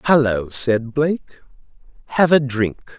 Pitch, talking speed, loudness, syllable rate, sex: 130 Hz, 120 wpm, -19 LUFS, 4.8 syllables/s, male